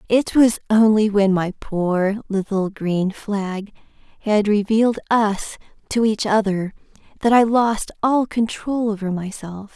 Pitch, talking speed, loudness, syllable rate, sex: 210 Hz, 135 wpm, -19 LUFS, 3.9 syllables/s, female